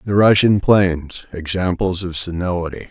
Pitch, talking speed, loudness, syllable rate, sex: 90 Hz, 105 wpm, -17 LUFS, 4.6 syllables/s, male